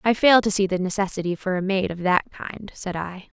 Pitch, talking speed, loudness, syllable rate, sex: 195 Hz, 245 wpm, -22 LUFS, 5.4 syllables/s, female